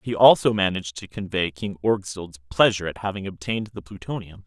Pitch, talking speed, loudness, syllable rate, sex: 100 Hz, 175 wpm, -23 LUFS, 5.9 syllables/s, male